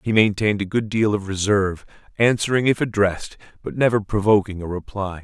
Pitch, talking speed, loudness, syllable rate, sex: 105 Hz, 170 wpm, -20 LUFS, 5.9 syllables/s, male